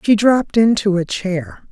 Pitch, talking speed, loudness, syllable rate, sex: 205 Hz, 175 wpm, -16 LUFS, 4.6 syllables/s, female